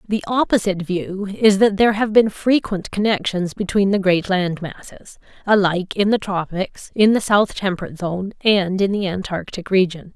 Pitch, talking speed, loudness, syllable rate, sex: 195 Hz, 170 wpm, -19 LUFS, 5.0 syllables/s, female